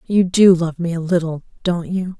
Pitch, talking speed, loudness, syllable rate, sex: 175 Hz, 220 wpm, -18 LUFS, 4.8 syllables/s, female